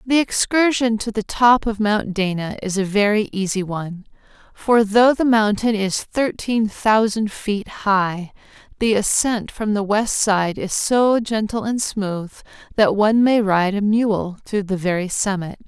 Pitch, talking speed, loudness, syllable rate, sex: 210 Hz, 165 wpm, -19 LUFS, 4.0 syllables/s, female